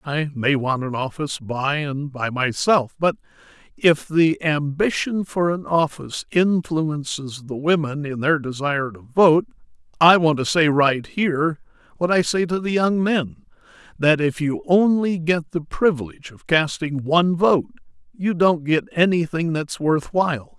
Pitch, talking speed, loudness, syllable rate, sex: 155 Hz, 165 wpm, -20 LUFS, 4.4 syllables/s, male